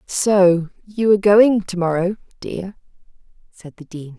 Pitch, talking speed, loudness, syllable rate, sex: 185 Hz, 130 wpm, -17 LUFS, 3.7 syllables/s, female